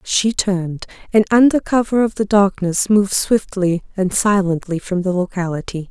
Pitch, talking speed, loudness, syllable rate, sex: 195 Hz, 150 wpm, -17 LUFS, 4.8 syllables/s, female